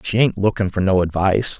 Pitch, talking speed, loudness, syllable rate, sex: 100 Hz, 225 wpm, -18 LUFS, 6.0 syllables/s, male